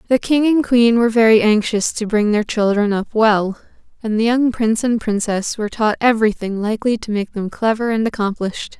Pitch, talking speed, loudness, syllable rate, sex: 220 Hz, 200 wpm, -17 LUFS, 5.5 syllables/s, female